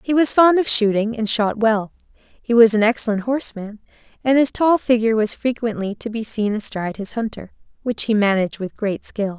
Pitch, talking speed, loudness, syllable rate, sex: 225 Hz, 200 wpm, -18 LUFS, 5.4 syllables/s, female